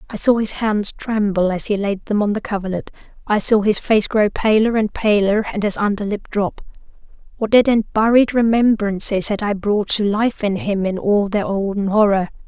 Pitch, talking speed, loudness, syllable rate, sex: 205 Hz, 200 wpm, -18 LUFS, 4.9 syllables/s, female